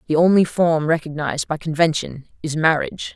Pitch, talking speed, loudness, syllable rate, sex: 160 Hz, 150 wpm, -19 LUFS, 5.7 syllables/s, female